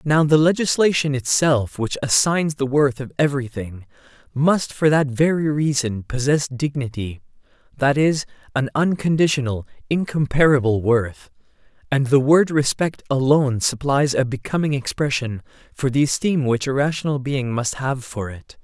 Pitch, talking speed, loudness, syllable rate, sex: 135 Hz, 140 wpm, -20 LUFS, 4.7 syllables/s, male